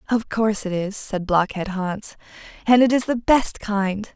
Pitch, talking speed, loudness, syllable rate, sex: 210 Hz, 190 wpm, -21 LUFS, 4.4 syllables/s, female